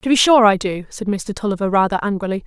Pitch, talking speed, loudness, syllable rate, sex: 205 Hz, 245 wpm, -17 LUFS, 6.3 syllables/s, female